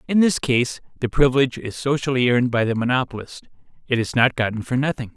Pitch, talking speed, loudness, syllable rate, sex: 125 Hz, 200 wpm, -20 LUFS, 6.3 syllables/s, male